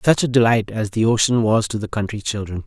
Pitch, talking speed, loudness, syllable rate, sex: 110 Hz, 250 wpm, -19 LUFS, 5.8 syllables/s, male